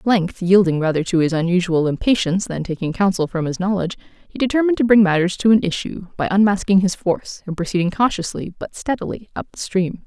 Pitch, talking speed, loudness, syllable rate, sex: 185 Hz, 205 wpm, -19 LUFS, 6.2 syllables/s, female